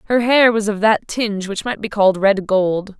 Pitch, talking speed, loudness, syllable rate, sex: 210 Hz, 240 wpm, -16 LUFS, 5.0 syllables/s, female